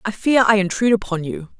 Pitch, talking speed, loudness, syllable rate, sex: 205 Hz, 225 wpm, -17 LUFS, 6.4 syllables/s, female